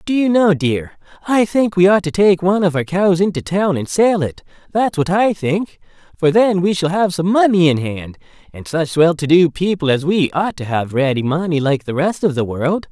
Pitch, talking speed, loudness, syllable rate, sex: 170 Hz, 235 wpm, -16 LUFS, 4.9 syllables/s, male